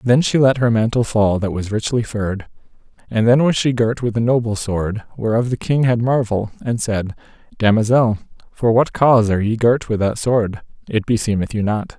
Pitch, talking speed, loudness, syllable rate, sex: 115 Hz, 200 wpm, -18 LUFS, 5.2 syllables/s, male